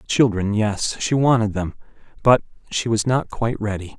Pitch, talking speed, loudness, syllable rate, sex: 110 Hz, 150 wpm, -20 LUFS, 5.3 syllables/s, male